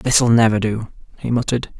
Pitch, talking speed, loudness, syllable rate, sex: 115 Hz, 165 wpm, -18 LUFS, 5.5 syllables/s, male